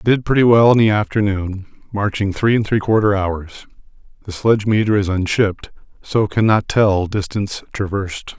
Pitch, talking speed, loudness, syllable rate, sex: 105 Hz, 155 wpm, -17 LUFS, 5.1 syllables/s, male